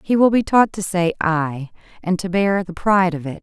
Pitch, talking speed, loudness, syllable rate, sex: 185 Hz, 245 wpm, -18 LUFS, 5.1 syllables/s, female